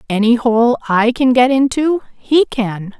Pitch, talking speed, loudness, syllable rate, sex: 245 Hz, 160 wpm, -14 LUFS, 3.9 syllables/s, female